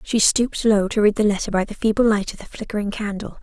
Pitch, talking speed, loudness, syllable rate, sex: 210 Hz, 265 wpm, -20 LUFS, 6.4 syllables/s, female